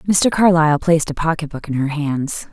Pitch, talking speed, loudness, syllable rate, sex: 160 Hz, 215 wpm, -17 LUFS, 5.5 syllables/s, female